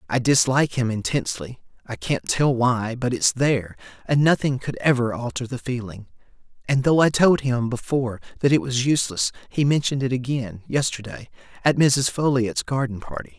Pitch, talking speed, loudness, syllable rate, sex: 130 Hz, 145 wpm, -22 LUFS, 5.3 syllables/s, male